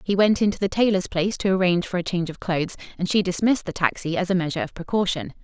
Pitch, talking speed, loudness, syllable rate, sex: 185 Hz, 255 wpm, -23 LUFS, 7.3 syllables/s, female